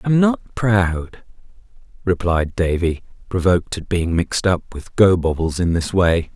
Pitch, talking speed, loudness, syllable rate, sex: 90 Hz, 140 wpm, -19 LUFS, 4.2 syllables/s, male